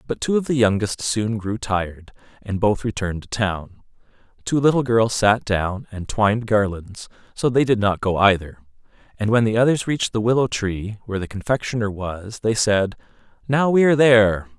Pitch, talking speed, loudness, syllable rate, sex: 110 Hz, 185 wpm, -20 LUFS, 5.2 syllables/s, male